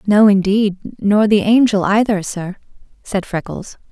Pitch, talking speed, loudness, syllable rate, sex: 205 Hz, 140 wpm, -15 LUFS, 4.3 syllables/s, female